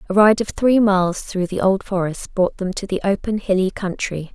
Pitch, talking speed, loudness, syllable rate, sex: 195 Hz, 220 wpm, -19 LUFS, 5.1 syllables/s, female